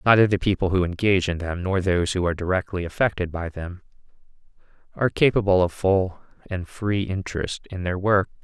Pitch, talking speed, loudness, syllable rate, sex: 95 Hz, 180 wpm, -23 LUFS, 5.9 syllables/s, male